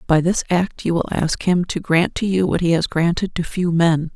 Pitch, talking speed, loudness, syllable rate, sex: 170 Hz, 260 wpm, -19 LUFS, 4.8 syllables/s, female